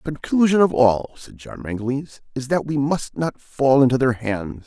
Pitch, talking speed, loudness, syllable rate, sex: 135 Hz, 205 wpm, -20 LUFS, 4.7 syllables/s, male